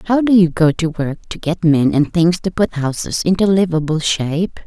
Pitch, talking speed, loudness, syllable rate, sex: 170 Hz, 220 wpm, -16 LUFS, 4.9 syllables/s, female